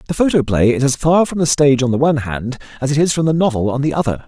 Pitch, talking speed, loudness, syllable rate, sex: 140 Hz, 295 wpm, -16 LUFS, 7.0 syllables/s, male